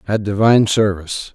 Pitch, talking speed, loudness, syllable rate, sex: 105 Hz, 135 wpm, -16 LUFS, 5.9 syllables/s, male